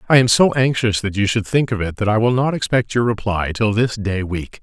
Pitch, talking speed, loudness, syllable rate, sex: 110 Hz, 275 wpm, -18 LUFS, 5.5 syllables/s, male